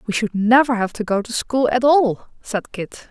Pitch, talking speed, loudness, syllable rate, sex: 230 Hz, 230 wpm, -18 LUFS, 4.6 syllables/s, female